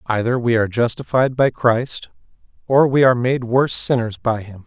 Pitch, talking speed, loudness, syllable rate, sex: 120 Hz, 180 wpm, -18 LUFS, 5.3 syllables/s, male